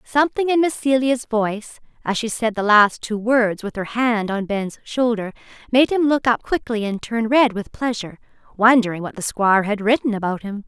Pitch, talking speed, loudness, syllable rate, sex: 225 Hz, 200 wpm, -19 LUFS, 5.2 syllables/s, female